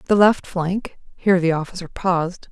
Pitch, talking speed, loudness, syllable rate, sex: 180 Hz, 165 wpm, -20 LUFS, 5.2 syllables/s, female